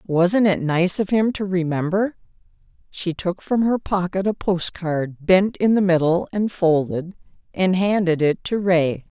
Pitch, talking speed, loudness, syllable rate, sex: 180 Hz, 165 wpm, -20 LUFS, 4.0 syllables/s, female